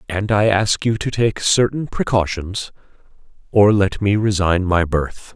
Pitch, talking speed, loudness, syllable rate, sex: 100 Hz, 155 wpm, -18 LUFS, 4.1 syllables/s, male